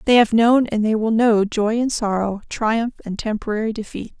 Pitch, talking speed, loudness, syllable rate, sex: 220 Hz, 200 wpm, -19 LUFS, 4.9 syllables/s, female